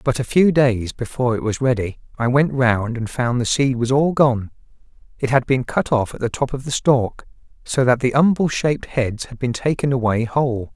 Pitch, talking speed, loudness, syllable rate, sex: 125 Hz, 225 wpm, -19 LUFS, 5.1 syllables/s, male